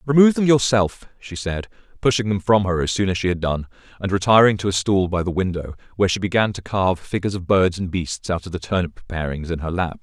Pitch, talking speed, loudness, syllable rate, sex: 95 Hz, 245 wpm, -20 LUFS, 6.3 syllables/s, male